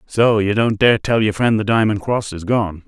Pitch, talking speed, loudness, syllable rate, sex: 110 Hz, 250 wpm, -17 LUFS, 4.8 syllables/s, male